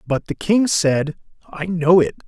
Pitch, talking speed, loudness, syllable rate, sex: 170 Hz, 185 wpm, -18 LUFS, 4.2 syllables/s, male